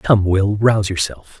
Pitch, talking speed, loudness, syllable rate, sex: 100 Hz, 170 wpm, -17 LUFS, 4.4 syllables/s, male